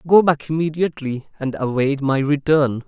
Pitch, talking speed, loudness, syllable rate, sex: 145 Hz, 145 wpm, -19 LUFS, 5.0 syllables/s, male